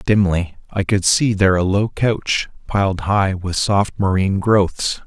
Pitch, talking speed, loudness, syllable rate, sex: 100 Hz, 165 wpm, -18 LUFS, 4.1 syllables/s, male